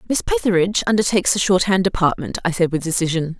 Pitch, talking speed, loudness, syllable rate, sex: 185 Hz, 175 wpm, -18 LUFS, 6.7 syllables/s, female